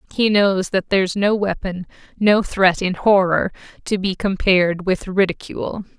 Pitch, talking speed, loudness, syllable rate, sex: 190 Hz, 150 wpm, -18 LUFS, 4.7 syllables/s, female